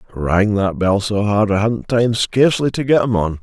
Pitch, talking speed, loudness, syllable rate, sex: 105 Hz, 225 wpm, -16 LUFS, 4.8 syllables/s, male